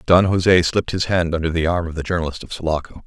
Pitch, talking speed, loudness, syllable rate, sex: 85 Hz, 255 wpm, -19 LUFS, 6.4 syllables/s, male